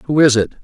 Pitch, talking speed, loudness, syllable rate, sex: 135 Hz, 285 wpm, -13 LUFS, 6.4 syllables/s, male